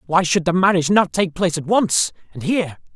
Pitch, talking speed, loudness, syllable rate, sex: 175 Hz, 225 wpm, -18 LUFS, 6.1 syllables/s, male